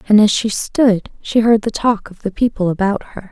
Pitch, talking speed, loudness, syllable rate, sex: 210 Hz, 235 wpm, -16 LUFS, 5.0 syllables/s, female